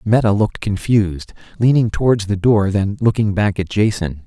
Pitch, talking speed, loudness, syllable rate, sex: 105 Hz, 170 wpm, -17 LUFS, 5.1 syllables/s, male